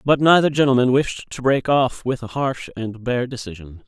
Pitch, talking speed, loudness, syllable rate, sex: 130 Hz, 200 wpm, -19 LUFS, 5.0 syllables/s, male